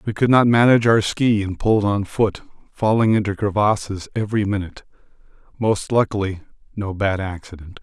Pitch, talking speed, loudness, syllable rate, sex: 105 Hz, 145 wpm, -19 LUFS, 5.6 syllables/s, male